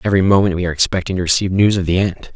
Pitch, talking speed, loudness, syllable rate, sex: 95 Hz, 280 wpm, -16 LUFS, 8.4 syllables/s, male